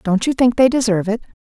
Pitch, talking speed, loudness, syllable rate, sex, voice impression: 225 Hz, 255 wpm, -16 LUFS, 6.9 syllables/s, female, very feminine, very adult-like, slightly middle-aged, slightly thin, relaxed, weak, slightly dark, hard, slightly clear, fluent, slightly raspy, cute, very intellectual, slightly refreshing, very sincere, very calm, very friendly, very reassuring, very unique, elegant, slightly wild, very sweet, slightly lively, kind, slightly intense, modest, slightly light